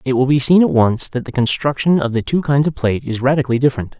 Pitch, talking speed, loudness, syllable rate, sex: 135 Hz, 270 wpm, -16 LUFS, 6.7 syllables/s, male